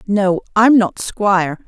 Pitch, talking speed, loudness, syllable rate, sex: 195 Hz, 145 wpm, -15 LUFS, 3.6 syllables/s, female